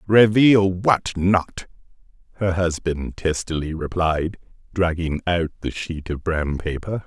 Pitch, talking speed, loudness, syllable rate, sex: 90 Hz, 120 wpm, -21 LUFS, 3.7 syllables/s, male